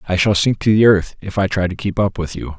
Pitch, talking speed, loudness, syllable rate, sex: 95 Hz, 325 wpm, -17 LUFS, 5.8 syllables/s, male